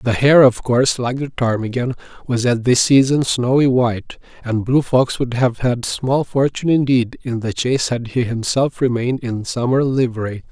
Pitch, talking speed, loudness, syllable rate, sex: 125 Hz, 185 wpm, -17 LUFS, 4.9 syllables/s, male